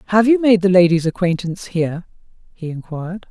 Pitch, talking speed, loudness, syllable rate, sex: 185 Hz, 165 wpm, -17 LUFS, 6.1 syllables/s, female